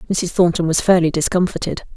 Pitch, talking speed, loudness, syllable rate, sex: 175 Hz, 155 wpm, -17 LUFS, 6.1 syllables/s, female